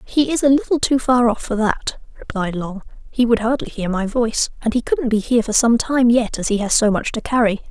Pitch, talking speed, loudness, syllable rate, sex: 230 Hz, 255 wpm, -18 LUFS, 5.6 syllables/s, female